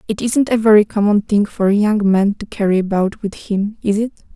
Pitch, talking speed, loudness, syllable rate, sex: 210 Hz, 235 wpm, -16 LUFS, 5.3 syllables/s, female